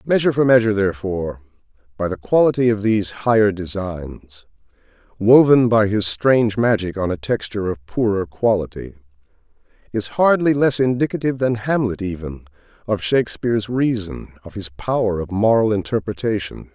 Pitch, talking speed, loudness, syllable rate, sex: 105 Hz, 135 wpm, -19 LUFS, 5.5 syllables/s, male